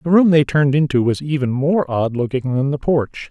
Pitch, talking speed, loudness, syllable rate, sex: 140 Hz, 235 wpm, -17 LUFS, 5.4 syllables/s, male